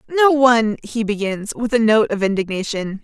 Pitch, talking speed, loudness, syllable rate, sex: 225 Hz, 180 wpm, -18 LUFS, 5.0 syllables/s, female